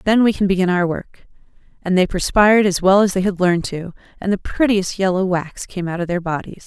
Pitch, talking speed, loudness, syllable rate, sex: 190 Hz, 235 wpm, -18 LUFS, 5.8 syllables/s, female